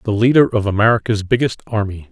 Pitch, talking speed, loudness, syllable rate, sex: 110 Hz, 170 wpm, -16 LUFS, 6.2 syllables/s, male